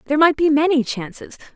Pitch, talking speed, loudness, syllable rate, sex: 295 Hz, 195 wpm, -17 LUFS, 6.6 syllables/s, female